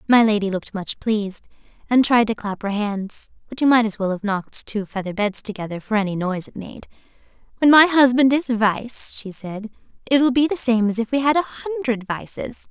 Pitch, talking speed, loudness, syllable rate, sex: 230 Hz, 215 wpm, -20 LUFS, 5.4 syllables/s, female